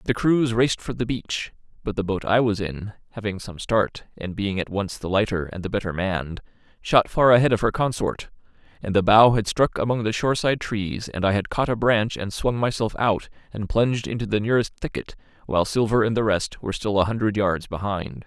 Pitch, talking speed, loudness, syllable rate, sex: 105 Hz, 225 wpm, -23 LUFS, 5.5 syllables/s, male